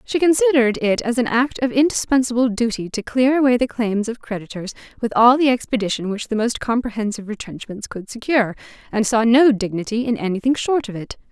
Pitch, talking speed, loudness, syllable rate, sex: 235 Hz, 190 wpm, -19 LUFS, 5.9 syllables/s, female